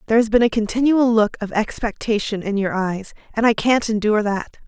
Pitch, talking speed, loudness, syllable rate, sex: 220 Hz, 205 wpm, -19 LUFS, 5.8 syllables/s, female